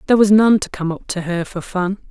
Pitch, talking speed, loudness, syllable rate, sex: 195 Hz, 285 wpm, -17 LUFS, 5.9 syllables/s, female